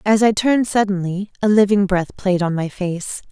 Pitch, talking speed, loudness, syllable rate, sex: 195 Hz, 200 wpm, -18 LUFS, 5.0 syllables/s, female